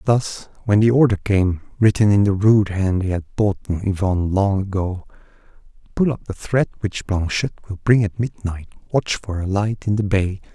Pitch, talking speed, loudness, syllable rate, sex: 100 Hz, 190 wpm, -20 LUFS, 5.0 syllables/s, male